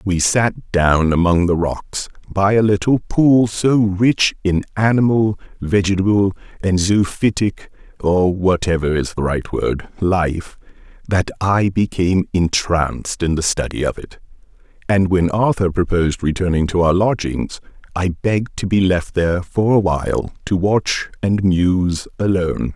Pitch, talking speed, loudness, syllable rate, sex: 95 Hz, 140 wpm, -17 LUFS, 4.3 syllables/s, male